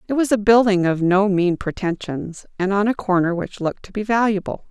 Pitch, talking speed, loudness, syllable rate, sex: 195 Hz, 215 wpm, -19 LUFS, 5.5 syllables/s, female